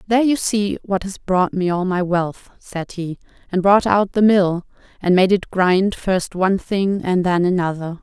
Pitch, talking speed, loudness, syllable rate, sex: 190 Hz, 200 wpm, -18 LUFS, 4.4 syllables/s, female